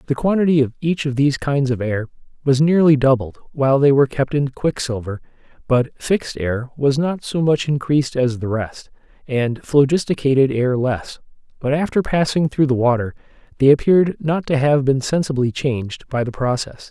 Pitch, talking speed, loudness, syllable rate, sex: 135 Hz, 175 wpm, -18 LUFS, 5.2 syllables/s, male